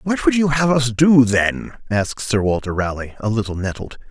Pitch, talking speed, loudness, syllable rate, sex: 120 Hz, 205 wpm, -18 LUFS, 5.1 syllables/s, male